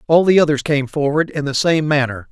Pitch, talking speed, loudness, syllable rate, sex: 150 Hz, 235 wpm, -16 LUFS, 5.6 syllables/s, male